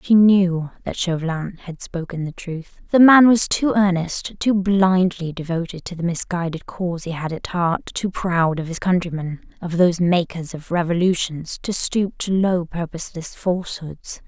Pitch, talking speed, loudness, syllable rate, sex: 175 Hz, 170 wpm, -20 LUFS, 4.6 syllables/s, female